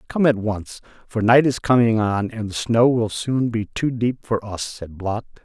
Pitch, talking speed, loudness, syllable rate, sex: 115 Hz, 220 wpm, -20 LUFS, 4.3 syllables/s, male